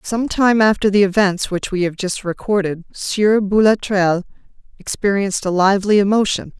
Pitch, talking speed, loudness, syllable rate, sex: 200 Hz, 145 wpm, -17 LUFS, 5.1 syllables/s, female